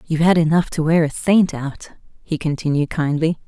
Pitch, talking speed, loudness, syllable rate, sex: 160 Hz, 190 wpm, -18 LUFS, 5.2 syllables/s, female